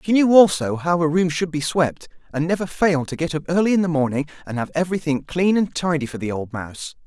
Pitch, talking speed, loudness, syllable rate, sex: 160 Hz, 245 wpm, -20 LUFS, 6.1 syllables/s, male